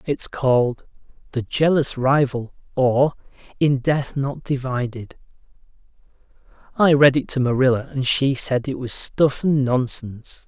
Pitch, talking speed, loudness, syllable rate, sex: 130 Hz, 130 wpm, -20 LUFS, 4.2 syllables/s, male